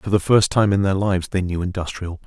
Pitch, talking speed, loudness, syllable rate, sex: 95 Hz, 290 wpm, -20 LUFS, 6.8 syllables/s, male